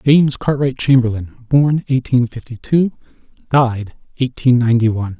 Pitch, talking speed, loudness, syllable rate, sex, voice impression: 125 Hz, 125 wpm, -16 LUFS, 5.4 syllables/s, male, masculine, very adult-like, slightly muffled, very fluent, slightly refreshing, sincere, calm, kind